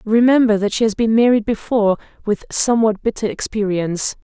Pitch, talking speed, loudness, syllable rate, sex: 215 Hz, 155 wpm, -17 LUFS, 5.8 syllables/s, female